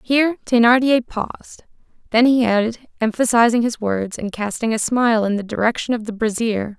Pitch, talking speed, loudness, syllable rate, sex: 230 Hz, 170 wpm, -18 LUFS, 5.6 syllables/s, female